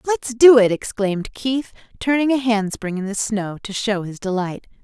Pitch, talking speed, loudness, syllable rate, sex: 220 Hz, 185 wpm, -19 LUFS, 4.6 syllables/s, female